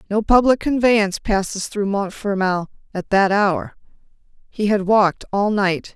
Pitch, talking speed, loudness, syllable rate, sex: 205 Hz, 140 wpm, -18 LUFS, 4.5 syllables/s, female